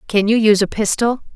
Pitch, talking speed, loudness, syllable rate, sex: 215 Hz, 220 wpm, -16 LUFS, 6.3 syllables/s, female